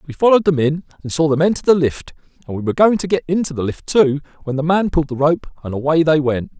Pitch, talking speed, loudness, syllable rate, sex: 155 Hz, 275 wpm, -17 LUFS, 6.7 syllables/s, male